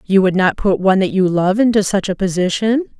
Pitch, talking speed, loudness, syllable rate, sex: 195 Hz, 240 wpm, -15 LUFS, 5.8 syllables/s, female